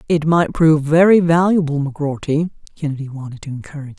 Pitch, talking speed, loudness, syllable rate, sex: 150 Hz, 165 wpm, -16 LUFS, 6.7 syllables/s, female